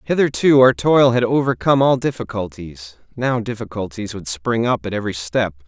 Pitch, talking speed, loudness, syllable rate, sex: 110 Hz, 160 wpm, -18 LUFS, 5.3 syllables/s, male